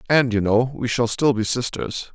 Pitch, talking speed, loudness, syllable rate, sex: 120 Hz, 225 wpm, -21 LUFS, 4.8 syllables/s, male